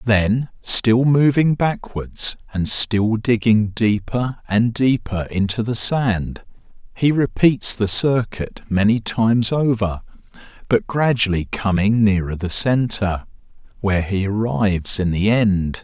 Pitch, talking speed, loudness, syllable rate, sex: 110 Hz, 120 wpm, -18 LUFS, 3.8 syllables/s, male